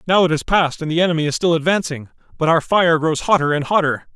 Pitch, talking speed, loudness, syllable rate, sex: 165 Hz, 245 wpm, -17 LUFS, 6.5 syllables/s, male